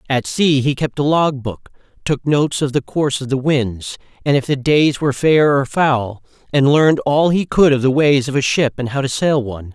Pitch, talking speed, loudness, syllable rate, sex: 140 Hz, 240 wpm, -16 LUFS, 5.1 syllables/s, male